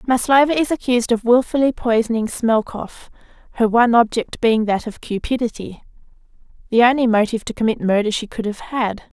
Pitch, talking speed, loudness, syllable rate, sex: 230 Hz, 155 wpm, -18 LUFS, 5.7 syllables/s, female